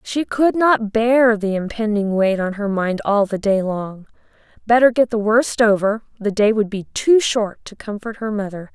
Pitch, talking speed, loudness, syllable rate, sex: 215 Hz, 200 wpm, -18 LUFS, 4.5 syllables/s, female